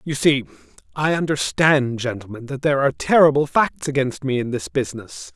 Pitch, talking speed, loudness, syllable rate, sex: 135 Hz, 170 wpm, -20 LUFS, 5.5 syllables/s, male